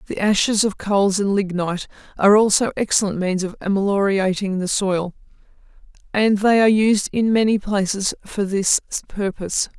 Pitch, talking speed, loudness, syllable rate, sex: 200 Hz, 145 wpm, -19 LUFS, 5.3 syllables/s, female